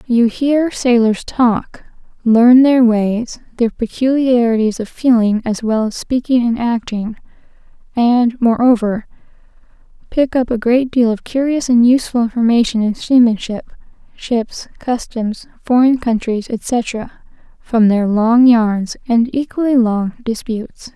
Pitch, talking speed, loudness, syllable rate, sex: 235 Hz, 125 wpm, -15 LUFS, 4.1 syllables/s, female